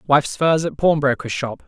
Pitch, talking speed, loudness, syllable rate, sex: 145 Hz, 180 wpm, -19 LUFS, 4.9 syllables/s, male